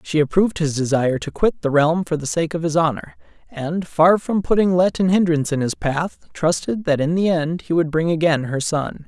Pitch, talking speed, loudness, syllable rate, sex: 165 Hz, 230 wpm, -19 LUFS, 5.3 syllables/s, male